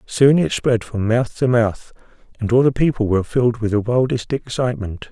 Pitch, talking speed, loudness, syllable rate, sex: 120 Hz, 200 wpm, -18 LUFS, 5.3 syllables/s, male